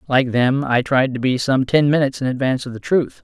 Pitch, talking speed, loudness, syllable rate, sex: 130 Hz, 260 wpm, -18 LUFS, 5.9 syllables/s, male